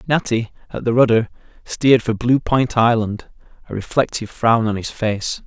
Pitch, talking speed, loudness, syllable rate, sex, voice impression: 115 Hz, 165 wpm, -18 LUFS, 4.9 syllables/s, male, masculine, slightly young, slightly adult-like, slightly thick, slightly tensed, slightly weak, slightly bright, hard, clear, fluent, cool, slightly intellectual, very refreshing, sincere, calm, slightly friendly, slightly reassuring, slightly unique, wild, slightly lively, kind, slightly intense